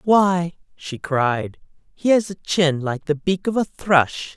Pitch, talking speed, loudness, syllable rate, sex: 170 Hz, 180 wpm, -20 LUFS, 3.5 syllables/s, male